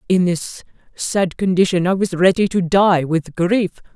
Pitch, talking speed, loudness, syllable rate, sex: 180 Hz, 165 wpm, -17 LUFS, 4.3 syllables/s, female